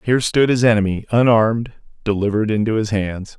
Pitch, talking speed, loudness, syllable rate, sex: 110 Hz, 160 wpm, -17 LUFS, 6.1 syllables/s, male